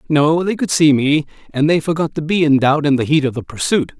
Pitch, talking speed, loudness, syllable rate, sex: 150 Hz, 270 wpm, -16 LUFS, 5.7 syllables/s, male